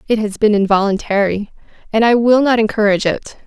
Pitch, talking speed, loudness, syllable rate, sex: 215 Hz, 175 wpm, -15 LUFS, 6.1 syllables/s, female